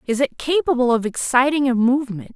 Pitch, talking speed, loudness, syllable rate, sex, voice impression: 260 Hz, 180 wpm, -19 LUFS, 5.9 syllables/s, female, feminine, adult-like, tensed, powerful, bright, soft, slightly muffled, intellectual, friendly, unique, lively